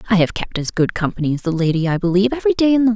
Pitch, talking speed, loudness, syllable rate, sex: 195 Hz, 325 wpm, -18 LUFS, 8.2 syllables/s, female